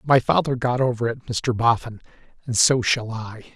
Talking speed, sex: 185 wpm, male